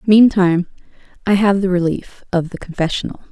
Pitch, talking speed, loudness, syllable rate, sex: 185 Hz, 145 wpm, -17 LUFS, 5.5 syllables/s, female